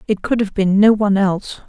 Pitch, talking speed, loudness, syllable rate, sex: 200 Hz, 250 wpm, -16 LUFS, 6.1 syllables/s, female